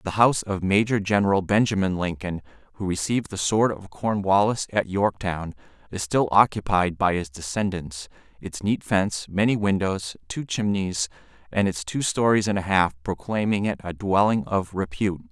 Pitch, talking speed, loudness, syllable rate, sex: 95 Hz, 160 wpm, -24 LUFS, 5.0 syllables/s, male